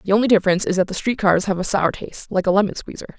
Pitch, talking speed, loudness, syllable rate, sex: 195 Hz, 300 wpm, -19 LUFS, 7.3 syllables/s, female